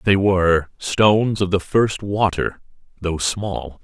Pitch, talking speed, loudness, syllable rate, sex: 95 Hz, 125 wpm, -19 LUFS, 3.7 syllables/s, male